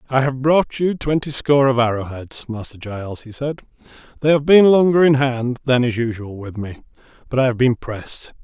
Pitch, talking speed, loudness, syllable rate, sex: 130 Hz, 200 wpm, -18 LUFS, 5.2 syllables/s, male